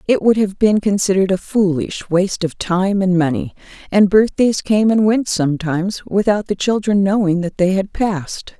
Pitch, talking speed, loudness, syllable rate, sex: 195 Hz, 180 wpm, -16 LUFS, 5.0 syllables/s, female